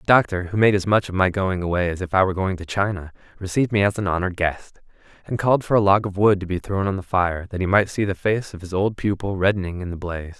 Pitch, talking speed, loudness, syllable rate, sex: 95 Hz, 290 wpm, -21 LUFS, 6.6 syllables/s, male